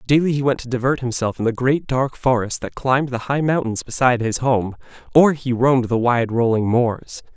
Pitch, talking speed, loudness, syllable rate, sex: 125 Hz, 210 wpm, -19 LUFS, 5.4 syllables/s, male